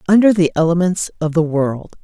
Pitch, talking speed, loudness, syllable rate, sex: 170 Hz, 175 wpm, -16 LUFS, 5.3 syllables/s, female